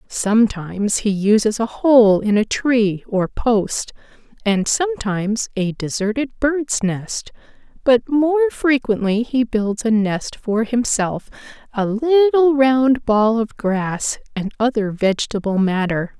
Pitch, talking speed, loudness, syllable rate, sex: 225 Hz, 125 wpm, -18 LUFS, 3.8 syllables/s, female